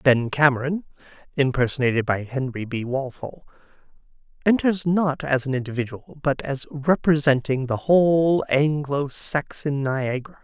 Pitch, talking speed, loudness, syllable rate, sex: 140 Hz, 115 wpm, -22 LUFS, 3.7 syllables/s, male